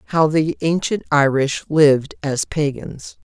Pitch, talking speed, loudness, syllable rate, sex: 150 Hz, 130 wpm, -18 LUFS, 4.0 syllables/s, female